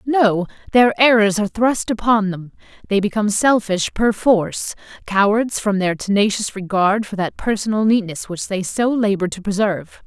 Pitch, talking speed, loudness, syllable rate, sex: 205 Hz, 160 wpm, -18 LUFS, 4.9 syllables/s, female